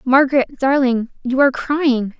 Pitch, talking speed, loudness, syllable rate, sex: 260 Hz, 135 wpm, -17 LUFS, 4.7 syllables/s, female